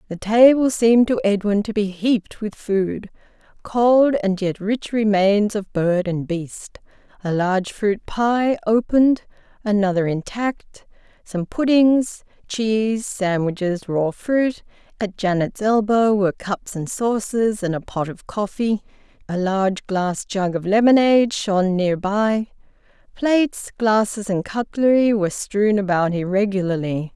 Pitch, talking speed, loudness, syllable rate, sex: 205 Hz, 135 wpm, -20 LUFS, 4.2 syllables/s, female